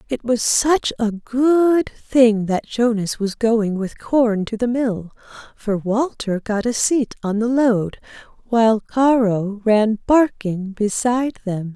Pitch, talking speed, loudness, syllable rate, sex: 225 Hz, 150 wpm, -19 LUFS, 3.5 syllables/s, female